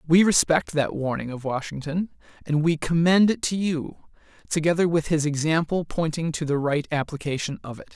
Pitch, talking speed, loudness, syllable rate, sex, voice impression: 160 Hz, 175 wpm, -24 LUFS, 5.2 syllables/s, male, masculine, adult-like, slightly clear, slightly unique, slightly lively